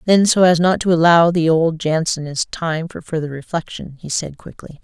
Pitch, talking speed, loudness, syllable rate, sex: 165 Hz, 200 wpm, -17 LUFS, 4.9 syllables/s, female